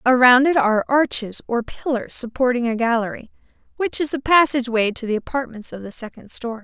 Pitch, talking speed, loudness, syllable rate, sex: 245 Hz, 190 wpm, -20 LUFS, 5.8 syllables/s, female